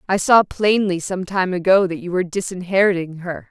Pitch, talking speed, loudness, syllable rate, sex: 185 Hz, 190 wpm, -18 LUFS, 5.4 syllables/s, female